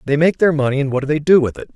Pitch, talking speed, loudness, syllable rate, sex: 145 Hz, 375 wpm, -16 LUFS, 7.6 syllables/s, male